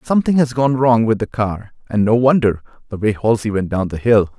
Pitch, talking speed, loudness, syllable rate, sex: 115 Hz, 220 wpm, -16 LUFS, 5.5 syllables/s, male